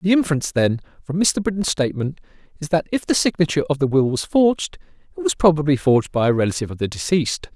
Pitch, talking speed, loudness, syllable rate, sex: 155 Hz, 215 wpm, -20 LUFS, 7.0 syllables/s, male